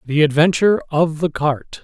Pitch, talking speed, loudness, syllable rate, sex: 160 Hz, 165 wpm, -17 LUFS, 4.9 syllables/s, male